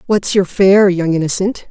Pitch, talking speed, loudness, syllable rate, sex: 190 Hz, 175 wpm, -13 LUFS, 4.5 syllables/s, female